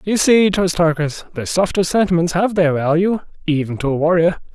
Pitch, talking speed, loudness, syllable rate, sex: 175 Hz, 185 wpm, -17 LUFS, 5.3 syllables/s, male